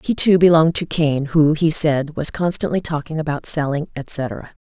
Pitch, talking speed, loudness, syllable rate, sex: 160 Hz, 180 wpm, -18 LUFS, 4.8 syllables/s, female